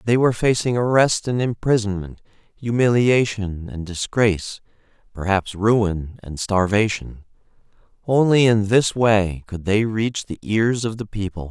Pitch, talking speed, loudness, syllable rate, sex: 105 Hz, 125 wpm, -20 LUFS, 4.2 syllables/s, male